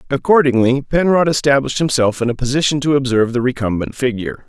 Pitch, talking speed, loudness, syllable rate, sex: 130 Hz, 160 wpm, -16 LUFS, 6.6 syllables/s, male